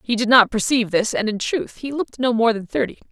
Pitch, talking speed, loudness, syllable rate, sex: 230 Hz, 270 wpm, -19 LUFS, 6.2 syllables/s, female